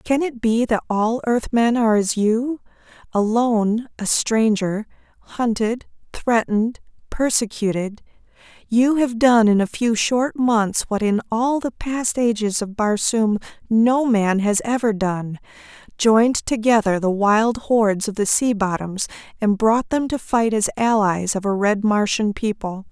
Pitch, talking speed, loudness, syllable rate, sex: 220 Hz, 150 wpm, -19 LUFS, 4.2 syllables/s, female